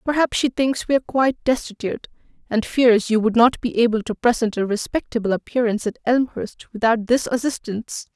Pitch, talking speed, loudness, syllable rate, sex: 235 Hz, 175 wpm, -20 LUFS, 5.8 syllables/s, female